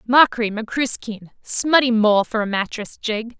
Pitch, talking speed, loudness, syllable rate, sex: 225 Hz, 140 wpm, -19 LUFS, 4.2 syllables/s, female